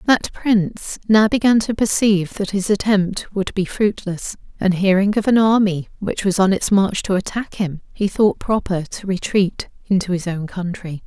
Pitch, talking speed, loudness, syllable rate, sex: 195 Hz, 185 wpm, -19 LUFS, 4.6 syllables/s, female